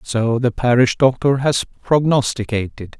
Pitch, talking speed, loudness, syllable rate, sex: 125 Hz, 120 wpm, -17 LUFS, 4.4 syllables/s, male